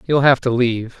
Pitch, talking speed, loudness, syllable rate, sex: 125 Hz, 240 wpm, -16 LUFS, 6.0 syllables/s, male